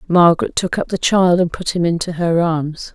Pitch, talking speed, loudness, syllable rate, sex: 170 Hz, 225 wpm, -16 LUFS, 5.1 syllables/s, female